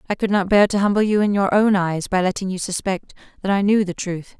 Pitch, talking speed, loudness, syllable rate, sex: 195 Hz, 275 wpm, -19 LUFS, 5.9 syllables/s, female